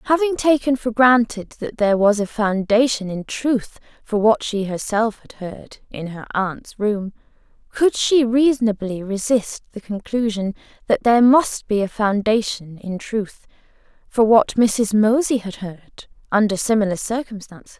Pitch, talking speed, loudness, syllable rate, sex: 220 Hz, 150 wpm, -19 LUFS, 4.3 syllables/s, female